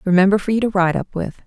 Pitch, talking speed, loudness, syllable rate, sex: 195 Hz, 285 wpm, -18 LUFS, 6.9 syllables/s, female